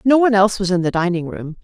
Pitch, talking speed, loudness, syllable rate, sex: 195 Hz, 295 wpm, -17 LUFS, 7.3 syllables/s, female